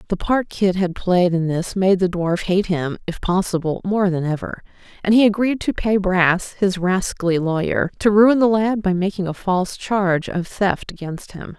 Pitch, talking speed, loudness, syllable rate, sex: 185 Hz, 200 wpm, -19 LUFS, 4.7 syllables/s, female